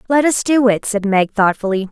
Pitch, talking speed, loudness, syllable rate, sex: 220 Hz, 220 wpm, -15 LUFS, 5.2 syllables/s, female